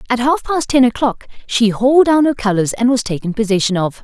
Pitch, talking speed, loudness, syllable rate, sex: 240 Hz, 225 wpm, -15 LUFS, 5.7 syllables/s, female